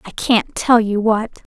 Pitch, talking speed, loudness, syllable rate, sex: 220 Hz, 190 wpm, -16 LUFS, 3.7 syllables/s, female